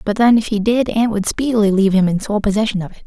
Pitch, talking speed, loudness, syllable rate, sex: 210 Hz, 295 wpm, -16 LUFS, 6.7 syllables/s, female